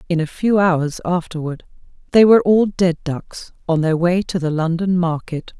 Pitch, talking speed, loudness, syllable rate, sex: 175 Hz, 180 wpm, -18 LUFS, 4.7 syllables/s, female